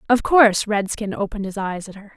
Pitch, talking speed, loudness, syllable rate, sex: 210 Hz, 220 wpm, -19 LUFS, 6.2 syllables/s, female